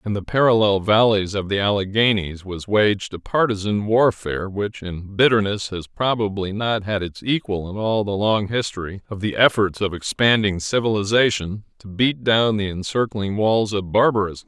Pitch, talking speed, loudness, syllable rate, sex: 105 Hz, 165 wpm, -20 LUFS, 4.8 syllables/s, male